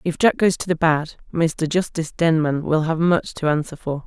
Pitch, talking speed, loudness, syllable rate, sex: 160 Hz, 220 wpm, -20 LUFS, 5.0 syllables/s, female